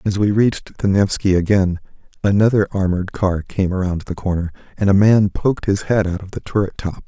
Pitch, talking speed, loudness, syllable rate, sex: 95 Hz, 205 wpm, -18 LUFS, 5.6 syllables/s, male